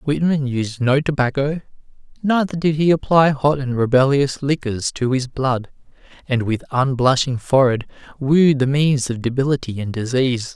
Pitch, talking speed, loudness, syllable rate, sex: 135 Hz, 150 wpm, -18 LUFS, 4.8 syllables/s, male